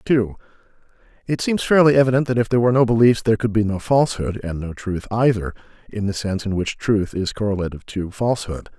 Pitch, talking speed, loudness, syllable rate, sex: 110 Hz, 205 wpm, -20 LUFS, 6.7 syllables/s, male